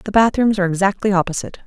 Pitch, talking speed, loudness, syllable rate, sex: 195 Hz, 180 wpm, -17 LUFS, 7.6 syllables/s, female